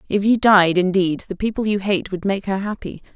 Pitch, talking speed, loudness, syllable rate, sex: 195 Hz, 230 wpm, -19 LUFS, 5.3 syllables/s, female